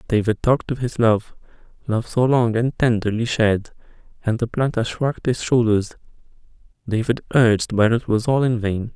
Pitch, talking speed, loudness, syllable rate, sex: 115 Hz, 160 wpm, -20 LUFS, 5.4 syllables/s, male